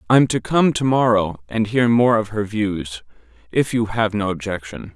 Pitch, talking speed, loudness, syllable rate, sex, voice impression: 110 Hz, 180 wpm, -19 LUFS, 4.5 syllables/s, male, masculine, adult-like, thick, tensed, powerful, slightly muffled, cool, intellectual, calm, mature, wild, lively, slightly strict